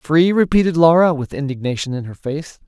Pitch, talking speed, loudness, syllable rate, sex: 150 Hz, 180 wpm, -17 LUFS, 5.5 syllables/s, male